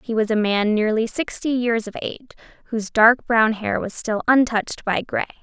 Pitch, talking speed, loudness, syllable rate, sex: 225 Hz, 200 wpm, -20 LUFS, 5.4 syllables/s, female